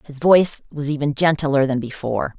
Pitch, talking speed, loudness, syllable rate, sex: 145 Hz, 175 wpm, -19 LUFS, 5.5 syllables/s, female